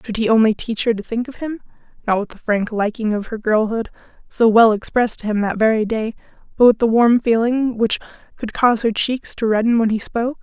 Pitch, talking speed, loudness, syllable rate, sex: 225 Hz, 230 wpm, -18 LUFS, 5.8 syllables/s, female